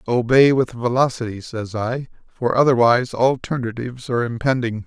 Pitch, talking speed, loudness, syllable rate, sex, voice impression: 120 Hz, 125 wpm, -19 LUFS, 5.3 syllables/s, male, very masculine, very adult-like, very middle-aged, very thick, relaxed, slightly weak, slightly bright, slightly soft, slightly muffled, fluent, raspy, cool, very intellectual, sincere, calm, very mature, very friendly, reassuring, unique, wild, sweet, very kind, modest